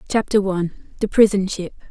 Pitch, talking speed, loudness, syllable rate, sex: 195 Hz, 160 wpm, -19 LUFS, 6.4 syllables/s, female